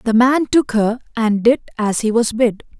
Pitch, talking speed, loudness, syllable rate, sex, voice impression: 230 Hz, 215 wpm, -16 LUFS, 4.5 syllables/s, female, slightly feminine, adult-like, slightly raspy, unique, slightly kind